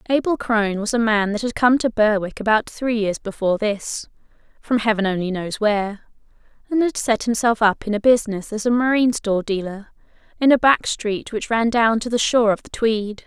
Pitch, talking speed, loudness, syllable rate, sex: 220 Hz, 205 wpm, -20 LUFS, 5.4 syllables/s, female